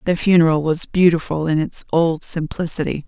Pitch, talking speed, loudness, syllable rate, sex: 165 Hz, 155 wpm, -18 LUFS, 5.2 syllables/s, female